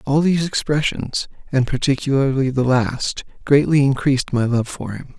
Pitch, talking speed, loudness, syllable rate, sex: 135 Hz, 150 wpm, -19 LUFS, 4.9 syllables/s, male